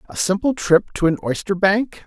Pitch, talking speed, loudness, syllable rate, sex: 190 Hz, 175 wpm, -19 LUFS, 5.1 syllables/s, male